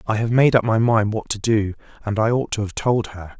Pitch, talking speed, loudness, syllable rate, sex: 110 Hz, 285 wpm, -20 LUFS, 5.4 syllables/s, male